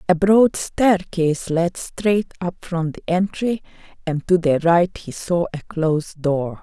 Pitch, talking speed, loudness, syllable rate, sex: 175 Hz, 165 wpm, -20 LUFS, 3.8 syllables/s, female